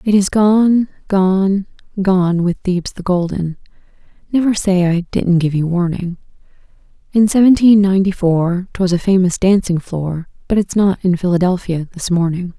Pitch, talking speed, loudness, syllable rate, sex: 185 Hz, 155 wpm, -15 LUFS, 4.0 syllables/s, female